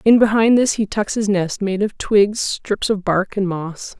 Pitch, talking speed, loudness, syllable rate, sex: 200 Hz, 225 wpm, -18 LUFS, 4.1 syllables/s, female